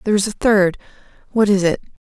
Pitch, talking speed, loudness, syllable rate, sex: 200 Hz, 205 wpm, -17 LUFS, 7.3 syllables/s, female